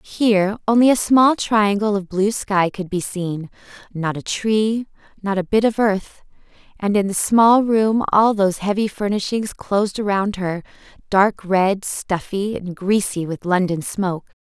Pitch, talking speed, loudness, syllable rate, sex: 200 Hz, 155 wpm, -19 LUFS, 4.2 syllables/s, female